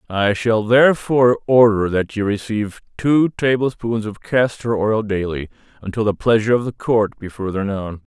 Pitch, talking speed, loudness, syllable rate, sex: 110 Hz, 165 wpm, -18 LUFS, 5.1 syllables/s, male